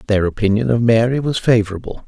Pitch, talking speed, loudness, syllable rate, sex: 115 Hz, 175 wpm, -16 LUFS, 6.4 syllables/s, male